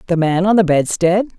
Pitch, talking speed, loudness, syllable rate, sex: 185 Hz, 215 wpm, -15 LUFS, 5.5 syllables/s, female